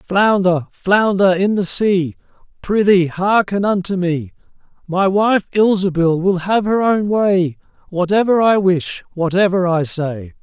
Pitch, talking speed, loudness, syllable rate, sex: 185 Hz, 130 wpm, -16 LUFS, 3.9 syllables/s, male